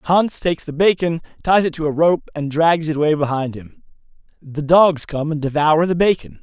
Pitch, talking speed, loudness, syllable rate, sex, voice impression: 155 Hz, 205 wpm, -17 LUFS, 5.0 syllables/s, male, masculine, adult-like, slightly tensed, fluent, slightly refreshing, sincere, lively